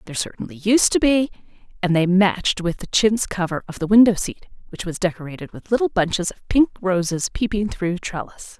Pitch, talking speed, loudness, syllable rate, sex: 195 Hz, 195 wpm, -20 LUFS, 5.5 syllables/s, female